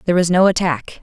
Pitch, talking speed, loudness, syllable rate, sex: 175 Hz, 235 wpm, -16 LUFS, 6.7 syllables/s, female